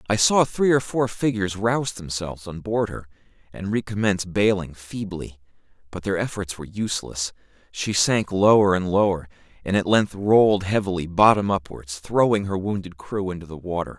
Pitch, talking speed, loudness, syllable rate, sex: 100 Hz, 165 wpm, -22 LUFS, 5.3 syllables/s, male